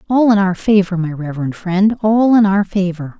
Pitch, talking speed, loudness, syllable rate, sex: 195 Hz, 190 wpm, -15 LUFS, 5.1 syllables/s, female